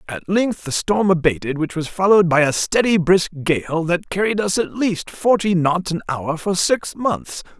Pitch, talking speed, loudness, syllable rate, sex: 180 Hz, 195 wpm, -19 LUFS, 4.5 syllables/s, male